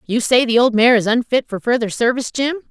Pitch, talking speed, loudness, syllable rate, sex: 240 Hz, 245 wpm, -16 LUFS, 6.0 syllables/s, female